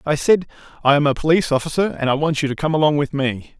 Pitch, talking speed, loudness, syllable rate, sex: 150 Hz, 265 wpm, -18 LUFS, 6.9 syllables/s, male